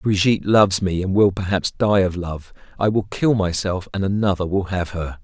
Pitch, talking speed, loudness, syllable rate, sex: 95 Hz, 205 wpm, -20 LUFS, 5.1 syllables/s, male